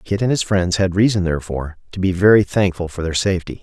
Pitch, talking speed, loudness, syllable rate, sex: 90 Hz, 230 wpm, -18 LUFS, 6.5 syllables/s, male